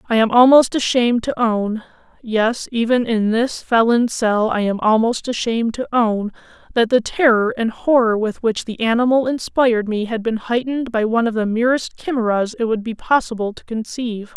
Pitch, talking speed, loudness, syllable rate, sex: 230 Hz, 175 wpm, -18 LUFS, 5.2 syllables/s, female